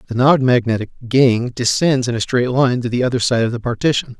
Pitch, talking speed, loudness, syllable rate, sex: 125 Hz, 230 wpm, -16 LUFS, 6.1 syllables/s, male